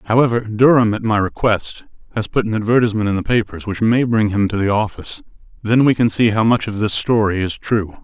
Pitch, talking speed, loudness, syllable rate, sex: 110 Hz, 225 wpm, -17 LUFS, 5.8 syllables/s, male